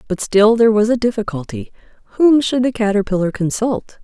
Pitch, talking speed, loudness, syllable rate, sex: 215 Hz, 150 wpm, -16 LUFS, 5.6 syllables/s, female